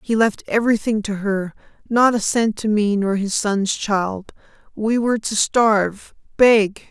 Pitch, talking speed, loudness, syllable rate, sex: 210 Hz, 140 wpm, -19 LUFS, 4.2 syllables/s, female